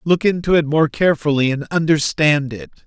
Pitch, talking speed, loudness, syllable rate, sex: 150 Hz, 165 wpm, -17 LUFS, 5.4 syllables/s, male